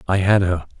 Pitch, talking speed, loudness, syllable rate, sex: 95 Hz, 225 wpm, -18 LUFS, 5.5 syllables/s, male